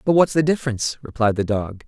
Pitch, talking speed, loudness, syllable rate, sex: 125 Hz, 225 wpm, -20 LUFS, 6.4 syllables/s, male